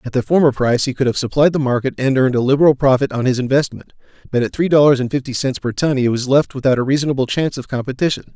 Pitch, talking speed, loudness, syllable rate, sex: 130 Hz, 260 wpm, -16 LUFS, 7.2 syllables/s, male